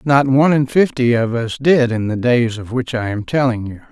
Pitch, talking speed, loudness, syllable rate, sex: 125 Hz, 245 wpm, -16 LUFS, 5.1 syllables/s, male